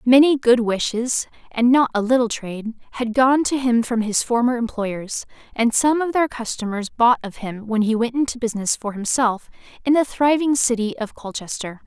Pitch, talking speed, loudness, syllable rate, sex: 240 Hz, 185 wpm, -20 LUFS, 5.0 syllables/s, female